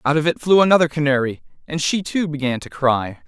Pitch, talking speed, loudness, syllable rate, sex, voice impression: 150 Hz, 220 wpm, -19 LUFS, 5.9 syllables/s, male, masculine, adult-like, tensed, slightly powerful, bright, clear, fluent, sincere, friendly, slightly wild, lively, light